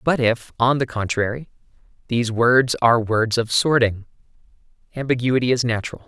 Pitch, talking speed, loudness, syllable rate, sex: 120 Hz, 140 wpm, -20 LUFS, 5.4 syllables/s, male